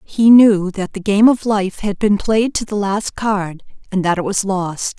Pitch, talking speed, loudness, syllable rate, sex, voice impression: 200 Hz, 230 wpm, -16 LUFS, 4.1 syllables/s, female, very feminine, adult-like, thin, slightly tensed, slightly weak, slightly dark, slightly hard, clear, fluent, slightly cute, cool, intellectual, very refreshing, sincere, slightly calm, friendly, reassuring, slightly unique, elegant, slightly wild, slightly sweet, lively, strict, slightly intense, slightly sharp, light